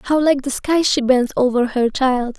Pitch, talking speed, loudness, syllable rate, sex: 260 Hz, 225 wpm, -17 LUFS, 4.4 syllables/s, female